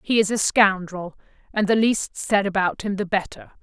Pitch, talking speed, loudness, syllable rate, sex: 200 Hz, 200 wpm, -21 LUFS, 4.9 syllables/s, female